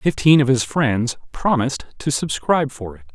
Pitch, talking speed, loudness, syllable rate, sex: 130 Hz, 170 wpm, -19 LUFS, 5.0 syllables/s, male